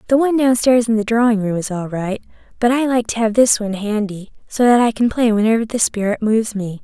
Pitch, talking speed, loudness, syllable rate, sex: 225 Hz, 245 wpm, -17 LUFS, 6.1 syllables/s, female